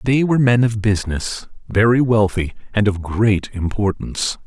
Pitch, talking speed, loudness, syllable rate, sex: 105 Hz, 150 wpm, -18 LUFS, 4.9 syllables/s, male